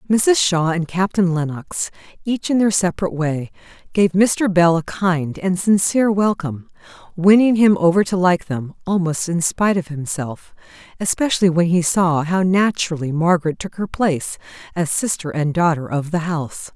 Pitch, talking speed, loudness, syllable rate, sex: 175 Hz, 165 wpm, -18 LUFS, 5.0 syllables/s, female